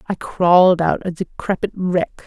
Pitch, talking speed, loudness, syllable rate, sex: 175 Hz, 160 wpm, -18 LUFS, 4.3 syllables/s, female